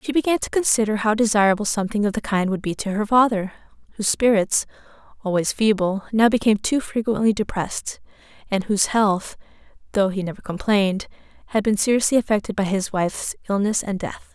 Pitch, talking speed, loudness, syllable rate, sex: 210 Hz, 170 wpm, -21 LUFS, 6.0 syllables/s, female